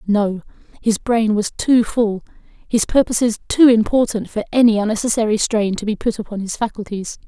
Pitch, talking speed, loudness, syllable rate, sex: 220 Hz, 155 wpm, -18 LUFS, 5.3 syllables/s, female